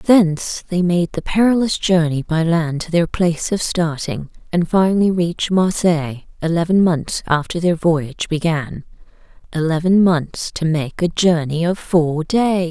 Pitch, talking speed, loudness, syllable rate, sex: 170 Hz, 150 wpm, -18 LUFS, 4.5 syllables/s, female